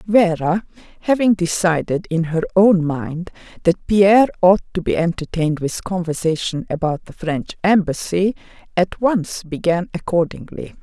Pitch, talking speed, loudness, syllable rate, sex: 180 Hz, 130 wpm, -18 LUFS, 4.6 syllables/s, female